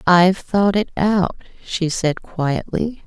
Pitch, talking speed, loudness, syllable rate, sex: 185 Hz, 135 wpm, -19 LUFS, 3.5 syllables/s, female